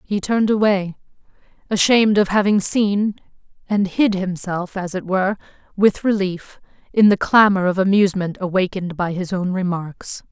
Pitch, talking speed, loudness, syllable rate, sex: 195 Hz, 145 wpm, -18 LUFS, 5.0 syllables/s, female